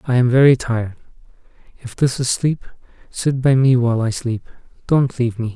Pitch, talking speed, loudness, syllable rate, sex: 125 Hz, 185 wpm, -17 LUFS, 5.7 syllables/s, male